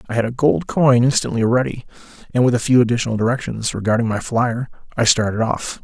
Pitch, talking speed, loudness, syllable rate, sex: 120 Hz, 195 wpm, -18 LUFS, 6.2 syllables/s, male